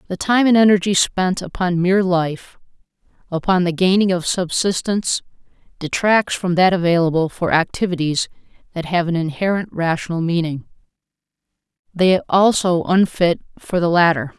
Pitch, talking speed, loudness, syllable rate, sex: 180 Hz, 130 wpm, -18 LUFS, 5.0 syllables/s, female